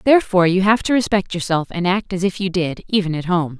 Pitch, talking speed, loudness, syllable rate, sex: 185 Hz, 250 wpm, -18 LUFS, 6.2 syllables/s, female